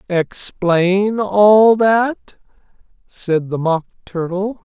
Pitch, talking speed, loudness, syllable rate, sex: 190 Hz, 90 wpm, -15 LUFS, 2.5 syllables/s, male